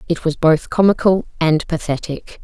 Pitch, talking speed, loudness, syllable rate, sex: 165 Hz, 150 wpm, -17 LUFS, 4.7 syllables/s, female